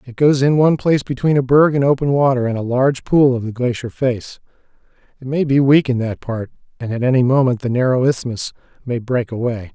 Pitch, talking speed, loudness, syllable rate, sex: 130 Hz, 215 wpm, -17 LUFS, 5.8 syllables/s, male